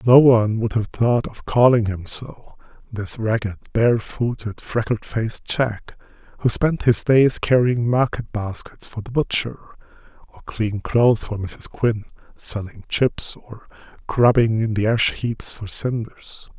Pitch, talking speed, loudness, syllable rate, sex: 115 Hz, 150 wpm, -20 LUFS, 4.1 syllables/s, male